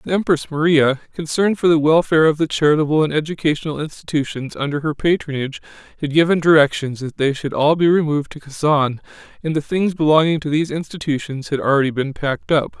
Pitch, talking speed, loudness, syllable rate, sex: 150 Hz, 185 wpm, -18 LUFS, 6.3 syllables/s, male